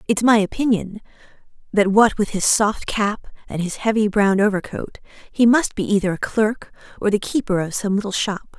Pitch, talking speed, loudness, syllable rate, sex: 210 Hz, 190 wpm, -19 LUFS, 5.0 syllables/s, female